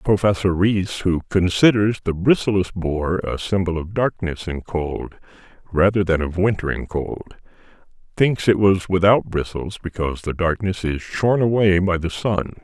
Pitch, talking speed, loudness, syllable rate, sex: 95 Hz, 155 wpm, -20 LUFS, 4.6 syllables/s, male